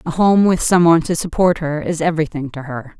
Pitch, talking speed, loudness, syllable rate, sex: 160 Hz, 240 wpm, -16 LUFS, 5.9 syllables/s, female